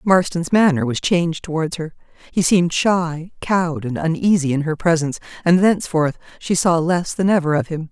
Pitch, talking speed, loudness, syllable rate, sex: 165 Hz, 180 wpm, -18 LUFS, 5.3 syllables/s, female